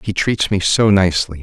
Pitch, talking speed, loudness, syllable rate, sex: 95 Hz, 210 wpm, -15 LUFS, 5.3 syllables/s, male